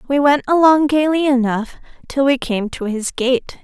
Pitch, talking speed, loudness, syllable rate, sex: 265 Hz, 180 wpm, -16 LUFS, 4.5 syllables/s, female